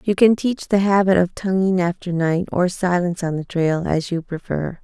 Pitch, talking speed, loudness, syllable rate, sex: 180 Hz, 210 wpm, -20 LUFS, 5.0 syllables/s, female